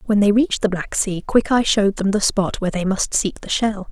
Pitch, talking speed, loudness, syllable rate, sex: 205 Hz, 260 wpm, -19 LUFS, 5.7 syllables/s, female